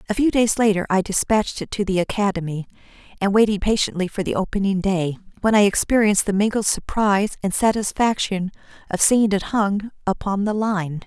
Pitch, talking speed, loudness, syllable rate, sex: 200 Hz, 175 wpm, -20 LUFS, 5.6 syllables/s, female